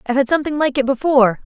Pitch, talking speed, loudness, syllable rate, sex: 265 Hz, 235 wpm, -16 LUFS, 8.2 syllables/s, female